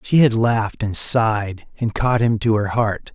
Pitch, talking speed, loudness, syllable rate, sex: 110 Hz, 210 wpm, -18 LUFS, 4.4 syllables/s, male